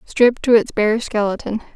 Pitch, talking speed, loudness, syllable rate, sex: 220 Hz, 170 wpm, -17 LUFS, 5.3 syllables/s, female